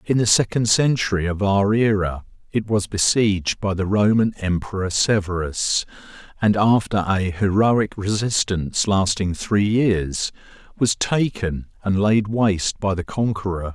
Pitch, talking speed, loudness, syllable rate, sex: 100 Hz, 135 wpm, -20 LUFS, 4.3 syllables/s, male